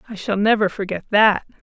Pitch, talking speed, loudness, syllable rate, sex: 205 Hz, 175 wpm, -19 LUFS, 5.3 syllables/s, female